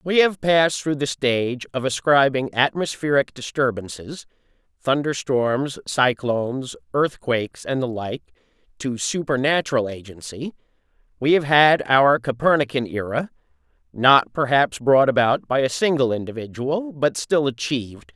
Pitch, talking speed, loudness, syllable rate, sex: 135 Hz, 110 wpm, -21 LUFS, 4.5 syllables/s, male